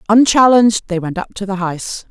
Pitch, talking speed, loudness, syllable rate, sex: 205 Hz, 200 wpm, -14 LUFS, 6.0 syllables/s, female